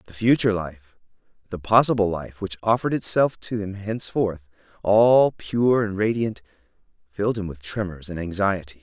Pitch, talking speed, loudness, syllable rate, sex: 100 Hz, 150 wpm, -22 LUFS, 5.1 syllables/s, male